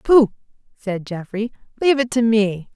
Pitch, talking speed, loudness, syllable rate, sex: 220 Hz, 150 wpm, -20 LUFS, 4.7 syllables/s, female